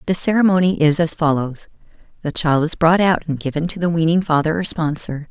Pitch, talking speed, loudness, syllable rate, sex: 165 Hz, 190 wpm, -17 LUFS, 5.7 syllables/s, female